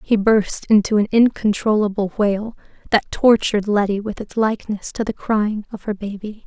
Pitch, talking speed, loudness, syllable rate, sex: 210 Hz, 165 wpm, -19 LUFS, 5.0 syllables/s, female